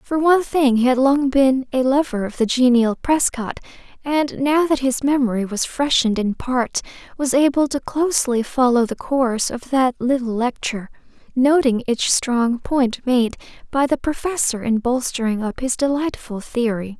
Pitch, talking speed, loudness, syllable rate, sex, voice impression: 255 Hz, 165 wpm, -19 LUFS, 4.7 syllables/s, female, feminine, slightly young, slightly thin, slightly bright, soft, slightly muffled, fluent, slightly cute, calm, friendly, elegant, kind, modest